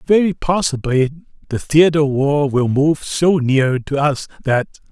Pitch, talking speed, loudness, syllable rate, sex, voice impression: 145 Hz, 160 wpm, -17 LUFS, 4.2 syllables/s, male, masculine, slightly old, slightly halting, slightly intellectual, sincere, calm, slightly mature, slightly wild